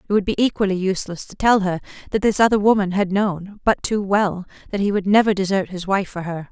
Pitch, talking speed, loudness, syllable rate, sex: 195 Hz, 240 wpm, -20 LUFS, 6.0 syllables/s, female